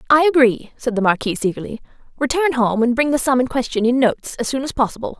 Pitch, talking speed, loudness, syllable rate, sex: 250 Hz, 230 wpm, -18 LUFS, 6.6 syllables/s, female